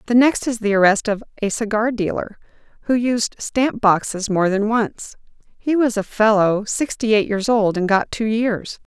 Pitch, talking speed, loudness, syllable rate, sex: 220 Hz, 190 wpm, -19 LUFS, 4.6 syllables/s, female